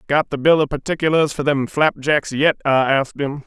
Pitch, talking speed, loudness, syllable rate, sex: 145 Hz, 210 wpm, -18 LUFS, 5.3 syllables/s, male